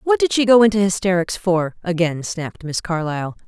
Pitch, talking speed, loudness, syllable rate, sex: 190 Hz, 190 wpm, -19 LUFS, 5.6 syllables/s, female